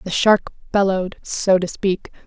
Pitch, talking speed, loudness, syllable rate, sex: 190 Hz, 160 wpm, -19 LUFS, 4.4 syllables/s, female